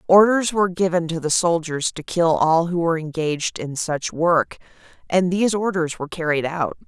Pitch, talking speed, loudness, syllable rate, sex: 170 Hz, 185 wpm, -20 LUFS, 5.2 syllables/s, female